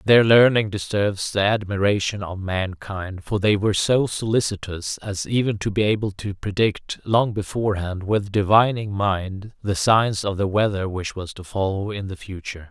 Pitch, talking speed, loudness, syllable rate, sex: 100 Hz, 170 wpm, -22 LUFS, 4.7 syllables/s, male